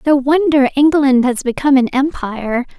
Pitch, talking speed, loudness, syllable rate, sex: 270 Hz, 150 wpm, -14 LUFS, 5.2 syllables/s, female